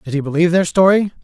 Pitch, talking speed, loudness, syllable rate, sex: 170 Hz, 240 wpm, -15 LUFS, 7.6 syllables/s, male